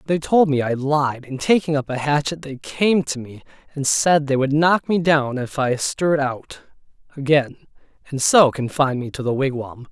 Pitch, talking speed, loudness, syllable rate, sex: 145 Hz, 200 wpm, -19 LUFS, 4.8 syllables/s, male